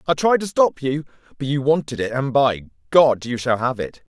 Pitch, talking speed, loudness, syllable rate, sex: 135 Hz, 230 wpm, -20 LUFS, 5.2 syllables/s, male